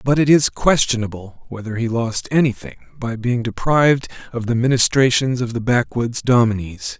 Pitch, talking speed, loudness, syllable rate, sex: 120 Hz, 155 wpm, -18 LUFS, 5.0 syllables/s, male